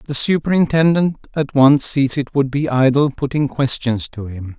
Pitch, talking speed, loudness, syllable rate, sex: 140 Hz, 170 wpm, -16 LUFS, 4.5 syllables/s, male